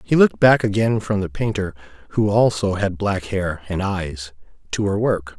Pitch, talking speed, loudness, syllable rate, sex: 100 Hz, 190 wpm, -20 LUFS, 3.5 syllables/s, male